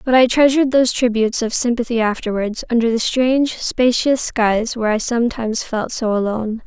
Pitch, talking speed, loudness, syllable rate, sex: 235 Hz, 170 wpm, -17 LUFS, 5.7 syllables/s, female